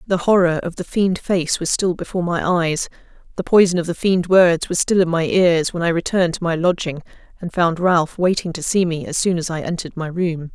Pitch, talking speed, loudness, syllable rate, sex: 175 Hz, 240 wpm, -18 LUFS, 5.5 syllables/s, female